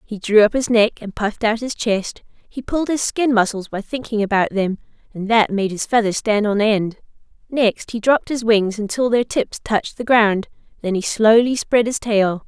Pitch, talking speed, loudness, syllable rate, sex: 220 Hz, 210 wpm, -18 LUFS, 5.0 syllables/s, female